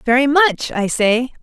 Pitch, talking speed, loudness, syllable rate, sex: 255 Hz, 170 wpm, -15 LUFS, 4.1 syllables/s, female